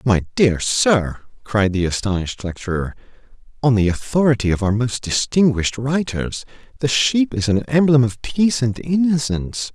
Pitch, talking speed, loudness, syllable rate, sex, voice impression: 120 Hz, 150 wpm, -18 LUFS, 5.0 syllables/s, male, masculine, adult-like, tensed, slightly hard, fluent, slightly raspy, cool, intellectual, slightly friendly, reassuring, wild, kind, slightly modest